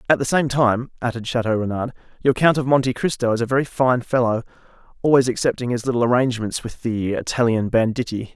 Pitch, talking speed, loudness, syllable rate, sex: 120 Hz, 185 wpm, -20 LUFS, 6.2 syllables/s, male